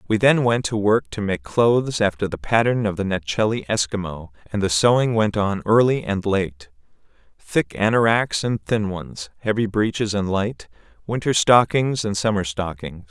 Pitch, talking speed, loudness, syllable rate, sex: 105 Hz, 170 wpm, -20 LUFS, 4.7 syllables/s, male